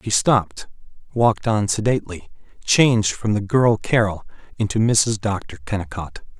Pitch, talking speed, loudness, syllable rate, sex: 105 Hz, 130 wpm, -19 LUFS, 4.8 syllables/s, male